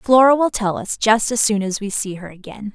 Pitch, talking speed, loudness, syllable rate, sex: 215 Hz, 260 wpm, -17 LUFS, 5.2 syllables/s, female